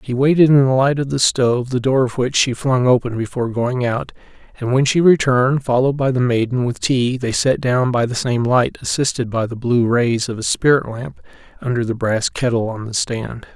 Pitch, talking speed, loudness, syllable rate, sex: 125 Hz, 225 wpm, -17 LUFS, 5.3 syllables/s, male